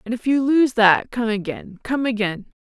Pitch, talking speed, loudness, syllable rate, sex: 235 Hz, 205 wpm, -19 LUFS, 4.6 syllables/s, female